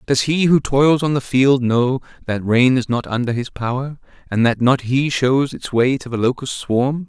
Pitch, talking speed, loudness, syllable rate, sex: 130 Hz, 220 wpm, -18 LUFS, 4.6 syllables/s, male